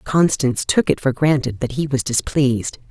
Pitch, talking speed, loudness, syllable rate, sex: 135 Hz, 185 wpm, -19 LUFS, 5.1 syllables/s, female